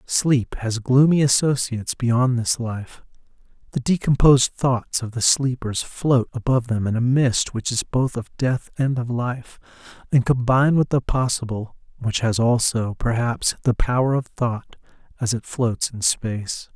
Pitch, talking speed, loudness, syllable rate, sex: 125 Hz, 160 wpm, -21 LUFS, 4.5 syllables/s, male